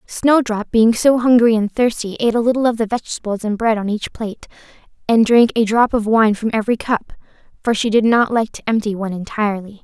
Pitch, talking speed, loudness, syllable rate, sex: 220 Hz, 215 wpm, -17 LUFS, 6.0 syllables/s, female